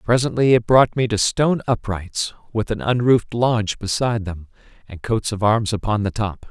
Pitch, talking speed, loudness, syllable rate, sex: 110 Hz, 185 wpm, -19 LUFS, 5.2 syllables/s, male